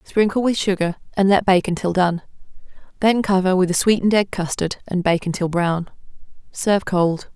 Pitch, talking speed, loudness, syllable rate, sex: 185 Hz, 170 wpm, -19 LUFS, 5.3 syllables/s, female